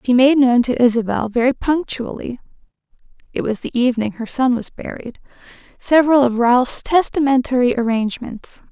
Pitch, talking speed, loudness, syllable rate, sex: 250 Hz, 125 wpm, -17 LUFS, 5.3 syllables/s, female